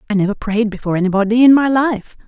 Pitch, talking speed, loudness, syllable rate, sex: 220 Hz, 210 wpm, -15 LUFS, 7.1 syllables/s, female